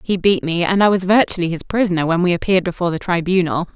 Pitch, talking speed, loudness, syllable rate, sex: 180 Hz, 240 wpm, -17 LUFS, 6.9 syllables/s, female